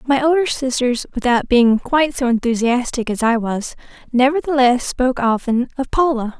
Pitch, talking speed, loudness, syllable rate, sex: 255 Hz, 150 wpm, -17 LUFS, 5.0 syllables/s, female